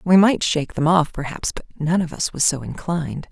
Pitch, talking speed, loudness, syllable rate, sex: 165 Hz, 235 wpm, -20 LUFS, 5.4 syllables/s, female